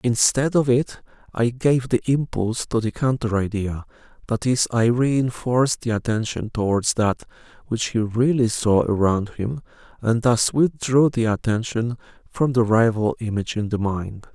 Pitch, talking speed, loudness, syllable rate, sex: 115 Hz, 155 wpm, -21 LUFS, 4.5 syllables/s, male